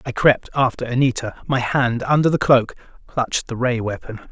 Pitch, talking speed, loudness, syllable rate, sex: 125 Hz, 180 wpm, -19 LUFS, 5.2 syllables/s, male